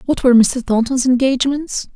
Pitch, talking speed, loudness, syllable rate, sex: 255 Hz, 155 wpm, -15 LUFS, 5.7 syllables/s, female